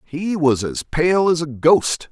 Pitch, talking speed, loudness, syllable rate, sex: 155 Hz, 200 wpm, -18 LUFS, 3.5 syllables/s, male